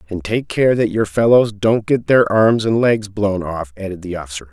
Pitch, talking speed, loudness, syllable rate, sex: 105 Hz, 225 wpm, -16 LUFS, 4.9 syllables/s, male